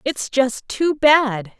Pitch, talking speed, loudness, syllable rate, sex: 265 Hz, 150 wpm, -18 LUFS, 2.7 syllables/s, female